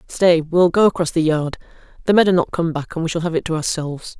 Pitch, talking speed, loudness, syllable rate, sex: 165 Hz, 270 wpm, -18 LUFS, 6.6 syllables/s, female